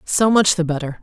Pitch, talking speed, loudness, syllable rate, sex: 175 Hz, 235 wpm, -17 LUFS, 5.4 syllables/s, female